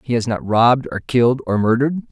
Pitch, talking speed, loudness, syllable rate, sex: 125 Hz, 225 wpm, -17 LUFS, 6.5 syllables/s, male